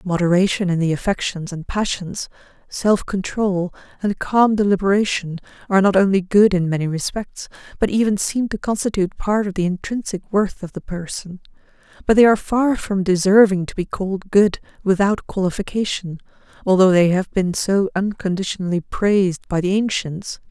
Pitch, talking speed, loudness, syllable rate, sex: 190 Hz, 155 wpm, -19 LUFS, 5.2 syllables/s, female